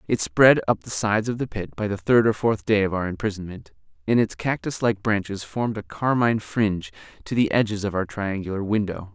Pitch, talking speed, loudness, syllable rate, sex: 105 Hz, 215 wpm, -23 LUFS, 5.7 syllables/s, male